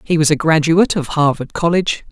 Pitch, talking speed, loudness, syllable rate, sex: 160 Hz, 200 wpm, -15 LUFS, 6.1 syllables/s, male